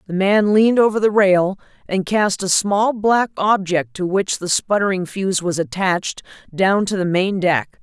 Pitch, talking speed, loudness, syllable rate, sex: 190 Hz, 185 wpm, -18 LUFS, 4.4 syllables/s, female